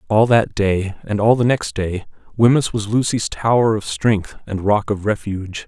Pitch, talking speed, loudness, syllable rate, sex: 105 Hz, 190 wpm, -18 LUFS, 4.6 syllables/s, male